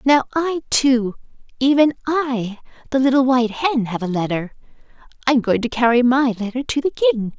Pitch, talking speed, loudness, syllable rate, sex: 255 Hz, 180 wpm, -18 LUFS, 5.1 syllables/s, female